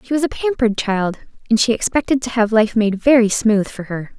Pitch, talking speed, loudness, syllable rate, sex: 230 Hz, 230 wpm, -17 LUFS, 5.6 syllables/s, female